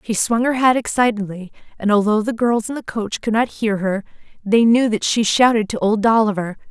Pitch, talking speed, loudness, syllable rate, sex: 220 Hz, 215 wpm, -18 LUFS, 5.3 syllables/s, female